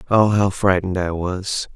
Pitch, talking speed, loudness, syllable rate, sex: 95 Hz, 170 wpm, -19 LUFS, 4.6 syllables/s, male